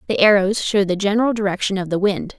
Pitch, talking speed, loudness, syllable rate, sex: 200 Hz, 225 wpm, -18 LUFS, 6.3 syllables/s, female